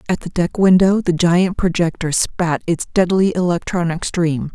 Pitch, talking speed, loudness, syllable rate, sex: 175 Hz, 160 wpm, -17 LUFS, 4.5 syllables/s, female